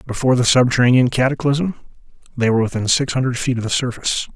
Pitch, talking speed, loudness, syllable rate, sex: 125 Hz, 195 wpm, -17 LUFS, 7.0 syllables/s, male